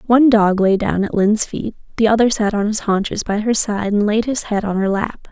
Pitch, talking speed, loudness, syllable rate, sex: 210 Hz, 260 wpm, -17 LUFS, 5.5 syllables/s, female